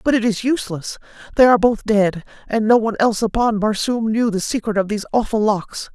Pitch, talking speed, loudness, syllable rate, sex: 220 Hz, 210 wpm, -18 LUFS, 6.1 syllables/s, female